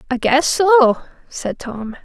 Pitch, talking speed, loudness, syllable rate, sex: 275 Hz, 145 wpm, -16 LUFS, 3.3 syllables/s, female